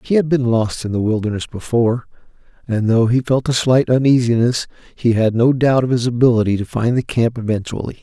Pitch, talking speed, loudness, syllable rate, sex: 120 Hz, 200 wpm, -17 LUFS, 5.6 syllables/s, male